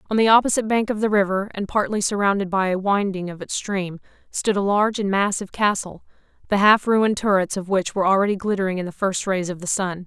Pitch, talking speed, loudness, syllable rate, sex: 195 Hz, 225 wpm, -21 LUFS, 6.3 syllables/s, female